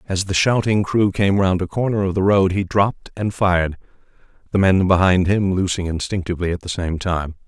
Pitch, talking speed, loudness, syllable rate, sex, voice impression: 95 Hz, 200 wpm, -19 LUFS, 5.4 syllables/s, male, very masculine, adult-like, slightly thick, cool, sincere, calm